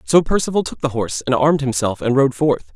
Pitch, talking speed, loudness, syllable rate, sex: 140 Hz, 240 wpm, -18 LUFS, 6.2 syllables/s, male